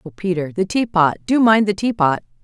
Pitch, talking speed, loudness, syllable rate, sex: 190 Hz, 150 wpm, -17 LUFS, 5.6 syllables/s, female